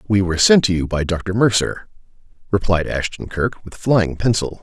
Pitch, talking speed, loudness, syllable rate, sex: 95 Hz, 180 wpm, -18 LUFS, 4.9 syllables/s, male